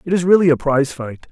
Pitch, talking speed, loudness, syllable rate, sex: 155 Hz, 275 wpm, -16 LUFS, 6.7 syllables/s, male